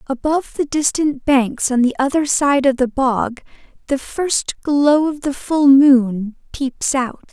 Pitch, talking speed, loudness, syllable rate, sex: 275 Hz, 165 wpm, -17 LUFS, 3.8 syllables/s, female